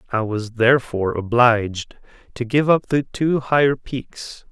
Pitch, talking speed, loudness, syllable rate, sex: 125 Hz, 145 wpm, -19 LUFS, 4.3 syllables/s, male